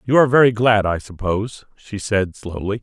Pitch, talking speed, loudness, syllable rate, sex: 105 Hz, 190 wpm, -18 LUFS, 5.4 syllables/s, male